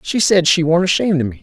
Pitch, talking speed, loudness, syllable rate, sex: 170 Hz, 295 wpm, -14 LUFS, 6.8 syllables/s, male